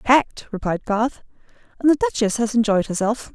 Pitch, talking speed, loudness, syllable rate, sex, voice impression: 230 Hz, 160 wpm, -21 LUFS, 5.3 syllables/s, female, very feminine, slightly young, slightly adult-like, very thin, slightly relaxed, slightly weak, slightly dark, slightly muffled, fluent, cute, intellectual, refreshing, very sincere, calm, friendly, reassuring, slightly unique, elegant, slightly wild, slightly sweet, slightly lively, kind, slightly modest